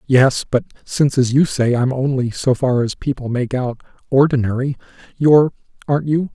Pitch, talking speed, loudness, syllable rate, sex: 130 Hz, 160 wpm, -17 LUFS, 5.3 syllables/s, male